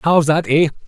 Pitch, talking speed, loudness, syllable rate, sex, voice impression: 155 Hz, 205 wpm, -15 LUFS, 5.5 syllables/s, male, masculine, middle-aged, tensed, powerful, slightly hard, clear, slightly halting, slightly raspy, intellectual, mature, slightly friendly, slightly unique, wild, lively, strict